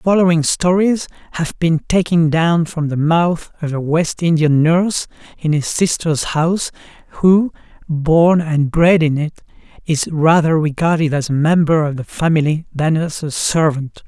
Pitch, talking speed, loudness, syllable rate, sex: 160 Hz, 160 wpm, -16 LUFS, 4.4 syllables/s, male